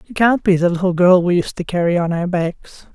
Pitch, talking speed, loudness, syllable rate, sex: 180 Hz, 265 wpm, -16 LUFS, 5.4 syllables/s, female